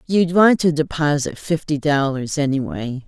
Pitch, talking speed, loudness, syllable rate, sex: 150 Hz, 155 wpm, -19 LUFS, 4.4 syllables/s, female